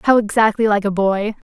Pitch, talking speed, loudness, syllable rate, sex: 210 Hz, 200 wpm, -17 LUFS, 5.6 syllables/s, female